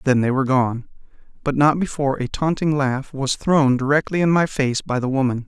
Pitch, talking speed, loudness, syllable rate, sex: 140 Hz, 210 wpm, -20 LUFS, 5.4 syllables/s, male